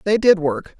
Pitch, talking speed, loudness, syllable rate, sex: 185 Hz, 225 wpm, -17 LUFS, 4.5 syllables/s, female